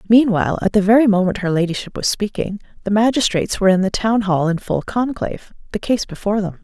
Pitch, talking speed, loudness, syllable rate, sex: 205 Hz, 200 wpm, -18 LUFS, 6.3 syllables/s, female